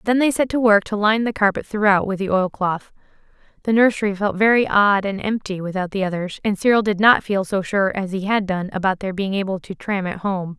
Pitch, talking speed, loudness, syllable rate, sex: 200 Hz, 245 wpm, -19 LUFS, 5.6 syllables/s, female